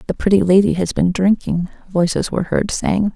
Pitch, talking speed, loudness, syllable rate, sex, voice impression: 185 Hz, 190 wpm, -17 LUFS, 5.4 syllables/s, female, feminine, adult-like, calm, slightly elegant